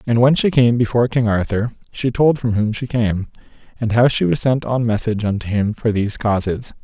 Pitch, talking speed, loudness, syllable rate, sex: 115 Hz, 220 wpm, -18 LUFS, 5.6 syllables/s, male